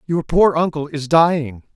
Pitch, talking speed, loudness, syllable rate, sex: 155 Hz, 170 wpm, -17 LUFS, 4.6 syllables/s, male